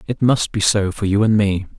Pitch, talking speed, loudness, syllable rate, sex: 105 Hz, 270 wpm, -17 LUFS, 5.2 syllables/s, male